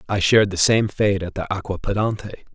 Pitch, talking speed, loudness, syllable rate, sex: 100 Hz, 165 wpm, -20 LUFS, 5.4 syllables/s, male